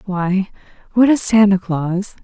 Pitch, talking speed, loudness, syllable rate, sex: 195 Hz, 135 wpm, -16 LUFS, 3.7 syllables/s, female